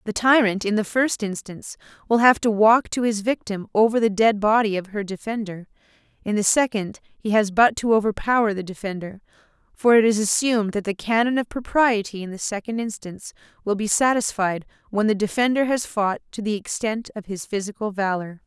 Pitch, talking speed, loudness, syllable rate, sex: 215 Hz, 190 wpm, -21 LUFS, 5.5 syllables/s, female